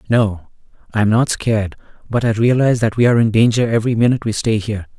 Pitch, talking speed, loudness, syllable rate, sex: 110 Hz, 215 wpm, -16 LUFS, 7.0 syllables/s, male